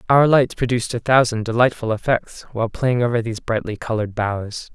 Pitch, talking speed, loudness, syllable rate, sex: 115 Hz, 175 wpm, -19 LUFS, 5.8 syllables/s, male